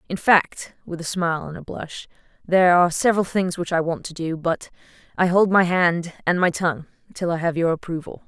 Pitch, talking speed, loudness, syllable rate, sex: 170 Hz, 205 wpm, -21 LUFS, 5.7 syllables/s, female